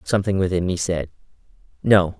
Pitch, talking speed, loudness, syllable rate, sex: 95 Hz, 135 wpm, -21 LUFS, 5.9 syllables/s, male